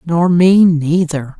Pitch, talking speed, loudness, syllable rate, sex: 165 Hz, 130 wpm, -12 LUFS, 3.1 syllables/s, female